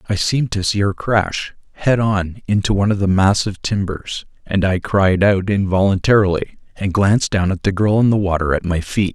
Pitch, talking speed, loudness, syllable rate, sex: 100 Hz, 205 wpm, -17 LUFS, 5.5 syllables/s, male